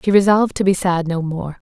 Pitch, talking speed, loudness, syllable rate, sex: 185 Hz, 250 wpm, -17 LUFS, 5.9 syllables/s, female